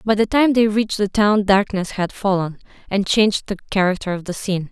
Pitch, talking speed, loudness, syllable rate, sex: 200 Hz, 215 wpm, -19 LUFS, 5.8 syllables/s, female